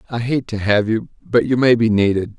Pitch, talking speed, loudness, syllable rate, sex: 110 Hz, 250 wpm, -17 LUFS, 5.4 syllables/s, male